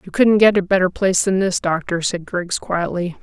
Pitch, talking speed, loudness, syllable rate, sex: 185 Hz, 225 wpm, -18 LUFS, 5.1 syllables/s, female